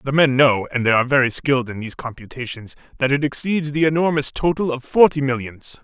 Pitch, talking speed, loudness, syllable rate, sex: 135 Hz, 185 wpm, -19 LUFS, 6.1 syllables/s, male